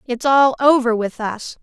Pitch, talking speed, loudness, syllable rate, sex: 245 Hz, 185 wpm, -16 LUFS, 4.0 syllables/s, female